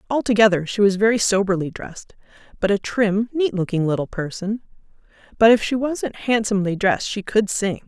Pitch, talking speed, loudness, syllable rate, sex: 205 Hz, 170 wpm, -20 LUFS, 5.6 syllables/s, female